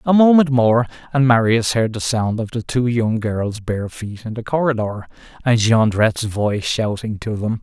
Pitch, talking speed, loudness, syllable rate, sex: 115 Hz, 190 wpm, -18 LUFS, 4.8 syllables/s, male